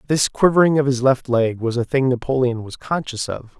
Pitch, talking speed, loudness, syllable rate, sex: 130 Hz, 215 wpm, -19 LUFS, 5.3 syllables/s, male